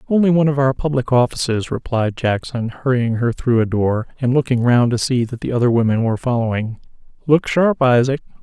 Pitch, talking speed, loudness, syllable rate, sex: 125 Hz, 190 wpm, -17 LUFS, 5.6 syllables/s, male